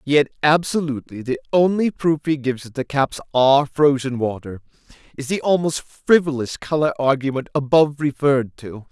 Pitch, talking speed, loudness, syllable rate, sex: 140 Hz, 150 wpm, -19 LUFS, 5.3 syllables/s, male